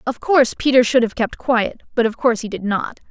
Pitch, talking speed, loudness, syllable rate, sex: 235 Hz, 250 wpm, -18 LUFS, 5.8 syllables/s, female